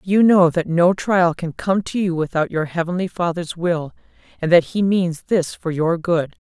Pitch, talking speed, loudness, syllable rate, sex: 175 Hz, 205 wpm, -19 LUFS, 4.5 syllables/s, female